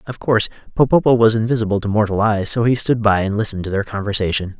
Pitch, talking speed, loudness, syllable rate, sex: 110 Hz, 220 wpm, -17 LUFS, 6.9 syllables/s, male